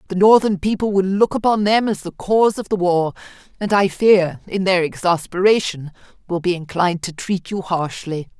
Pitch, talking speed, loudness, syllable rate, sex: 190 Hz, 185 wpm, -18 LUFS, 5.1 syllables/s, female